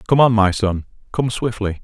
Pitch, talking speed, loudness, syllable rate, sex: 105 Hz, 195 wpm, -18 LUFS, 5.1 syllables/s, male